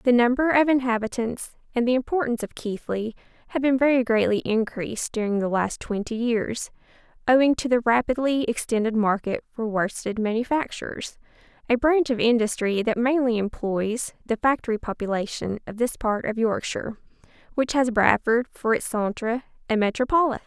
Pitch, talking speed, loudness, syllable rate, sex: 235 Hz, 150 wpm, -24 LUFS, 5.3 syllables/s, female